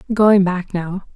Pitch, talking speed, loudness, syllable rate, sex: 190 Hz, 155 wpm, -16 LUFS, 4.0 syllables/s, female